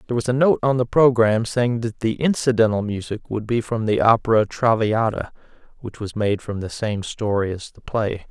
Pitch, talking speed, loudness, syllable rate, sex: 110 Hz, 200 wpm, -20 LUFS, 5.3 syllables/s, male